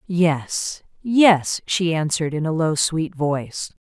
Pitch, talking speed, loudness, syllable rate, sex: 165 Hz, 125 wpm, -20 LUFS, 3.5 syllables/s, female